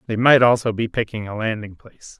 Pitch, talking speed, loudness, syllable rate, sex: 110 Hz, 220 wpm, -19 LUFS, 6.0 syllables/s, male